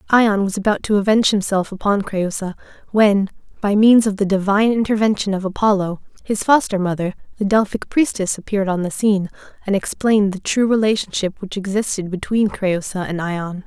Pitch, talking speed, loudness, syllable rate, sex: 200 Hz, 165 wpm, -18 LUFS, 5.5 syllables/s, female